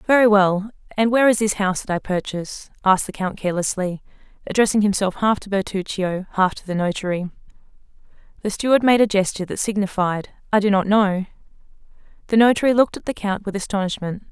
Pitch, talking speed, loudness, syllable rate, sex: 200 Hz, 175 wpm, -20 LUFS, 6.3 syllables/s, female